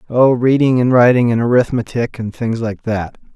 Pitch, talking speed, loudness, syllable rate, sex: 120 Hz, 180 wpm, -15 LUFS, 5.0 syllables/s, male